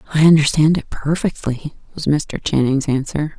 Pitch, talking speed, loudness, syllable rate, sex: 150 Hz, 140 wpm, -17 LUFS, 4.8 syllables/s, female